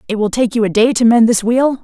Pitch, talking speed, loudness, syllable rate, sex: 230 Hz, 325 wpm, -13 LUFS, 6.1 syllables/s, female